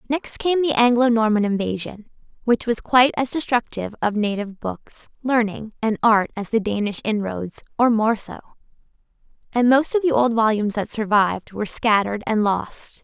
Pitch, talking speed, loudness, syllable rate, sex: 225 Hz, 165 wpm, -20 LUFS, 5.2 syllables/s, female